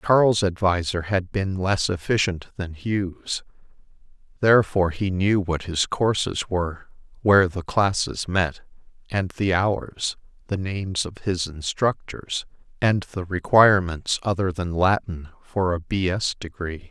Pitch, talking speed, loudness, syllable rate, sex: 95 Hz, 135 wpm, -23 LUFS, 4.1 syllables/s, male